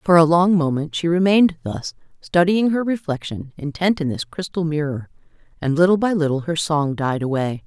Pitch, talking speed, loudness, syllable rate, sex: 165 Hz, 180 wpm, -20 LUFS, 5.3 syllables/s, female